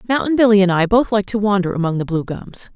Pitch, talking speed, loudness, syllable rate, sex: 200 Hz, 260 wpm, -16 LUFS, 6.6 syllables/s, female